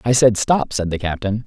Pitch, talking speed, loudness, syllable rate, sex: 110 Hz, 245 wpm, -18 LUFS, 5.1 syllables/s, male